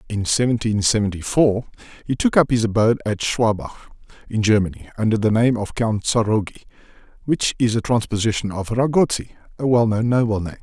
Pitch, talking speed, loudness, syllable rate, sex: 110 Hz, 165 wpm, -20 LUFS, 5.7 syllables/s, male